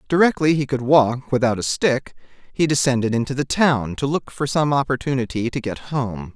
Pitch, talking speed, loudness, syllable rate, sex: 130 Hz, 190 wpm, -20 LUFS, 5.2 syllables/s, male